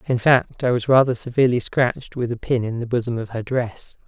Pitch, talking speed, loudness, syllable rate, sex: 120 Hz, 235 wpm, -21 LUFS, 5.7 syllables/s, male